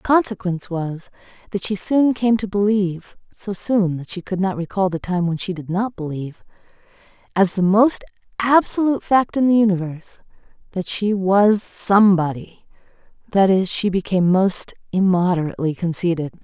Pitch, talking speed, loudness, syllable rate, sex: 190 Hz, 150 wpm, -19 LUFS, 5.1 syllables/s, female